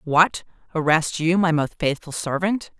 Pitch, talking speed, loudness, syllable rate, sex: 165 Hz, 150 wpm, -21 LUFS, 4.4 syllables/s, female